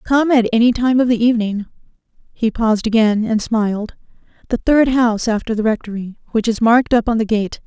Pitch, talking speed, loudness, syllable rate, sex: 225 Hz, 190 wpm, -16 LUFS, 5.9 syllables/s, female